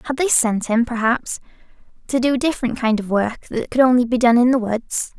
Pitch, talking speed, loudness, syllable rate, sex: 240 Hz, 230 wpm, -18 LUFS, 5.6 syllables/s, female